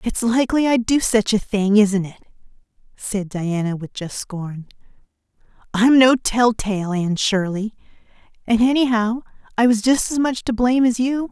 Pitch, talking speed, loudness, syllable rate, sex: 220 Hz, 160 wpm, -19 LUFS, 4.8 syllables/s, female